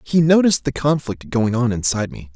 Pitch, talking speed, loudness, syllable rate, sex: 125 Hz, 205 wpm, -18 LUFS, 5.8 syllables/s, male